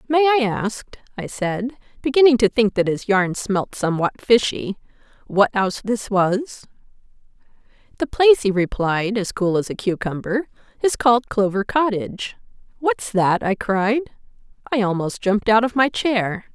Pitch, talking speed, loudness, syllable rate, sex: 215 Hz, 150 wpm, -20 LUFS, 4.7 syllables/s, female